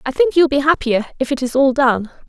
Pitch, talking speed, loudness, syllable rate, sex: 270 Hz, 265 wpm, -16 LUFS, 5.9 syllables/s, female